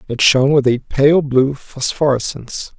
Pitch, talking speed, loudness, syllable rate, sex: 135 Hz, 150 wpm, -15 LUFS, 4.7 syllables/s, male